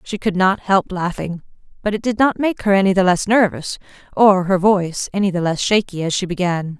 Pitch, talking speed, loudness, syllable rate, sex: 190 Hz, 220 wpm, -17 LUFS, 5.4 syllables/s, female